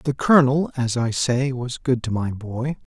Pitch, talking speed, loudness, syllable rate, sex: 130 Hz, 205 wpm, -21 LUFS, 4.6 syllables/s, male